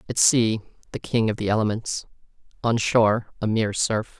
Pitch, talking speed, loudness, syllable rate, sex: 110 Hz, 170 wpm, -23 LUFS, 5.4 syllables/s, male